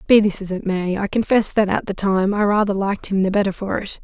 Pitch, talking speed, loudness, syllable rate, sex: 200 Hz, 285 wpm, -19 LUFS, 6.0 syllables/s, female